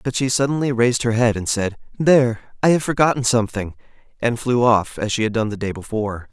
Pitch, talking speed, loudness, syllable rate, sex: 120 Hz, 220 wpm, -19 LUFS, 6.0 syllables/s, male